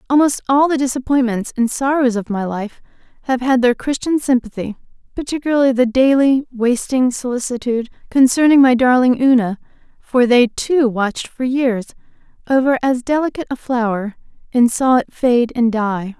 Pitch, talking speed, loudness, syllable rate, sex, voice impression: 250 Hz, 150 wpm, -16 LUFS, 5.1 syllables/s, female, feminine, adult-like, slightly relaxed, bright, soft, fluent, intellectual, calm, friendly, elegant, lively, slightly sharp